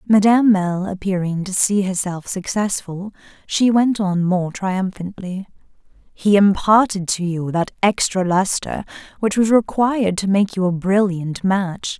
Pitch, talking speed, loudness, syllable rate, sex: 195 Hz, 140 wpm, -18 LUFS, 4.3 syllables/s, female